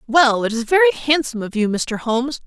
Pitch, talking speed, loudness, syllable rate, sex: 255 Hz, 220 wpm, -18 LUFS, 5.8 syllables/s, female